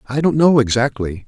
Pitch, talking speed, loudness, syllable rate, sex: 125 Hz, 190 wpm, -16 LUFS, 5.2 syllables/s, male